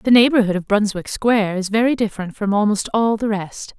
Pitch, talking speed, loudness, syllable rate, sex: 210 Hz, 205 wpm, -18 LUFS, 5.7 syllables/s, female